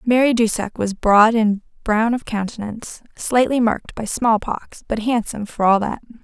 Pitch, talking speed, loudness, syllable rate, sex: 220 Hz, 165 wpm, -19 LUFS, 4.9 syllables/s, female